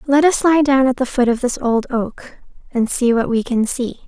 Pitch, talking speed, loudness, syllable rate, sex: 255 Hz, 250 wpm, -17 LUFS, 4.9 syllables/s, female